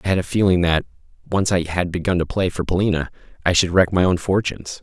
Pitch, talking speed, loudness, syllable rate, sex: 90 Hz, 235 wpm, -20 LUFS, 6.3 syllables/s, male